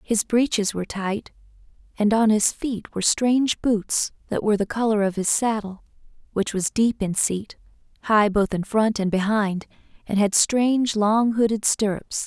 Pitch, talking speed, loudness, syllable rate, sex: 210 Hz, 170 wpm, -22 LUFS, 4.6 syllables/s, female